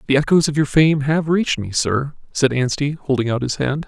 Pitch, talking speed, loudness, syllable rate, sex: 140 Hz, 230 wpm, -18 LUFS, 5.4 syllables/s, male